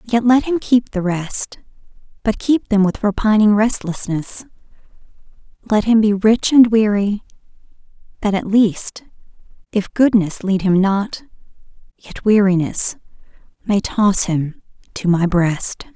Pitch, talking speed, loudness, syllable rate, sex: 205 Hz, 130 wpm, -17 LUFS, 4.0 syllables/s, female